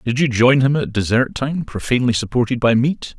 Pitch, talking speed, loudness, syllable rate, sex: 125 Hz, 205 wpm, -17 LUFS, 5.5 syllables/s, male